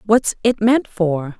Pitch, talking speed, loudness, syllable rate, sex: 205 Hz, 170 wpm, -17 LUFS, 3.3 syllables/s, female